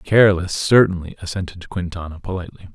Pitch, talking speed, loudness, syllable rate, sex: 90 Hz, 110 wpm, -19 LUFS, 6.1 syllables/s, male